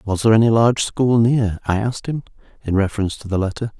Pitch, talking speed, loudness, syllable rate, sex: 110 Hz, 220 wpm, -18 LUFS, 6.9 syllables/s, male